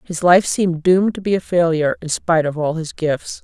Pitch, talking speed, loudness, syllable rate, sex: 170 Hz, 245 wpm, -17 LUFS, 5.8 syllables/s, female